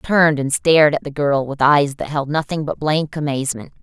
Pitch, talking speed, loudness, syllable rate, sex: 145 Hz, 235 wpm, -18 LUFS, 5.8 syllables/s, female